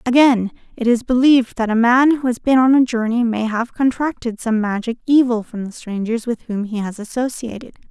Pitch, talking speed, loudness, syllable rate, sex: 235 Hz, 205 wpm, -17 LUFS, 5.3 syllables/s, female